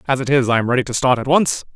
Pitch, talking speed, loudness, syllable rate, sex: 130 Hz, 340 wpm, -17 LUFS, 7.3 syllables/s, male